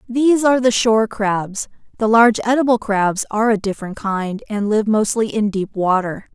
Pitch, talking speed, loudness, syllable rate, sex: 215 Hz, 180 wpm, -17 LUFS, 5.2 syllables/s, female